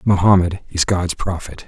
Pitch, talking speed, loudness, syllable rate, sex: 90 Hz, 145 wpm, -18 LUFS, 4.6 syllables/s, male